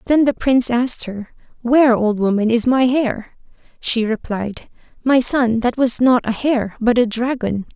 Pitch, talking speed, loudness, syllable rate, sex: 240 Hz, 180 wpm, -17 LUFS, 4.5 syllables/s, female